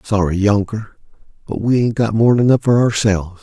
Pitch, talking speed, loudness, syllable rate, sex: 110 Hz, 175 wpm, -15 LUFS, 5.6 syllables/s, male